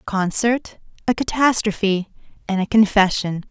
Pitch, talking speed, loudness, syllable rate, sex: 210 Hz, 120 wpm, -19 LUFS, 4.9 syllables/s, female